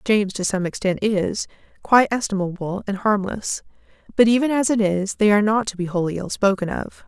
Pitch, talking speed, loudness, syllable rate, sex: 205 Hz, 185 wpm, -21 LUFS, 5.7 syllables/s, female